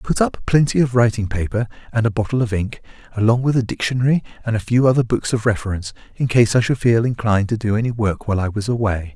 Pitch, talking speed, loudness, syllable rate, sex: 115 Hz, 240 wpm, -19 LUFS, 6.7 syllables/s, male